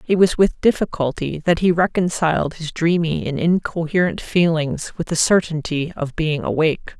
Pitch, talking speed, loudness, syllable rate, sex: 165 Hz, 155 wpm, -19 LUFS, 4.9 syllables/s, female